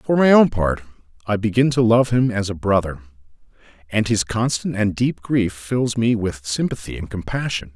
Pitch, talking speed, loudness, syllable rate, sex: 110 Hz, 185 wpm, -20 LUFS, 4.9 syllables/s, male